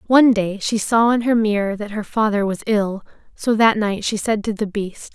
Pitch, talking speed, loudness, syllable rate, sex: 215 Hz, 235 wpm, -19 LUFS, 5.0 syllables/s, female